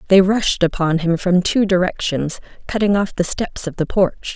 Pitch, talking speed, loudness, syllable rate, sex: 185 Hz, 195 wpm, -18 LUFS, 4.7 syllables/s, female